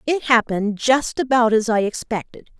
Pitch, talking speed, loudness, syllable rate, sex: 235 Hz, 160 wpm, -19 LUFS, 5.0 syllables/s, female